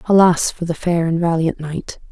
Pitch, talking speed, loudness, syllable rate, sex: 170 Hz, 200 wpm, -18 LUFS, 4.8 syllables/s, female